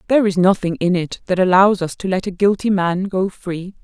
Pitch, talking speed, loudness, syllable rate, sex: 185 Hz, 235 wpm, -17 LUFS, 5.5 syllables/s, female